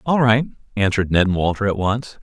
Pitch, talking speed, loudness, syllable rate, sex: 105 Hz, 215 wpm, -19 LUFS, 6.1 syllables/s, male